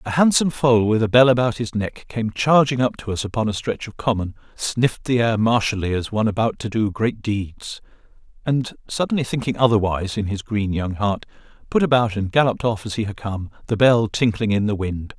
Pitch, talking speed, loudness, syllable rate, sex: 110 Hz, 215 wpm, -20 LUFS, 5.6 syllables/s, male